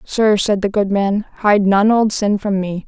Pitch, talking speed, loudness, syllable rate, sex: 205 Hz, 230 wpm, -16 LUFS, 4.3 syllables/s, female